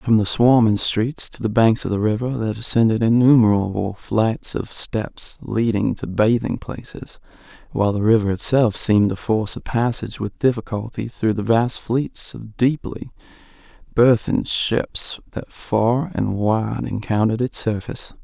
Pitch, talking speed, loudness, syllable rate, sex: 110 Hz, 150 wpm, -20 LUFS, 4.6 syllables/s, male